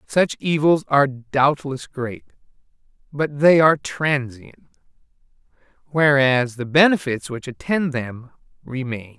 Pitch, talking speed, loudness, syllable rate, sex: 140 Hz, 105 wpm, -19 LUFS, 3.9 syllables/s, male